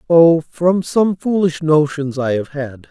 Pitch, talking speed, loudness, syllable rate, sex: 155 Hz, 165 wpm, -16 LUFS, 3.7 syllables/s, male